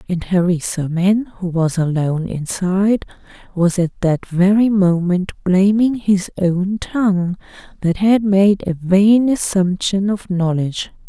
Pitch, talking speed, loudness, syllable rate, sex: 190 Hz, 125 wpm, -17 LUFS, 4.0 syllables/s, female